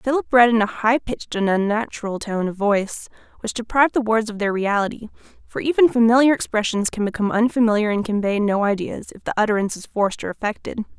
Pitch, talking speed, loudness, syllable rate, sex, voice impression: 220 Hz, 195 wpm, -20 LUFS, 6.4 syllables/s, female, feminine, adult-like, tensed, powerful, bright, clear, fluent, intellectual, friendly, elegant, lively